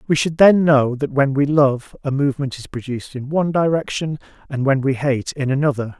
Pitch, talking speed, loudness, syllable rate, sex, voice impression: 140 Hz, 210 wpm, -18 LUFS, 5.5 syllables/s, male, masculine, adult-like, thin, relaxed, slightly soft, fluent, slightly raspy, slightly intellectual, refreshing, sincere, friendly, kind, slightly modest